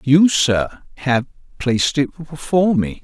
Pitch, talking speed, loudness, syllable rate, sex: 140 Hz, 140 wpm, -18 LUFS, 4.0 syllables/s, male